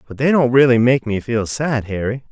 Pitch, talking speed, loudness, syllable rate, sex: 125 Hz, 235 wpm, -16 LUFS, 5.2 syllables/s, male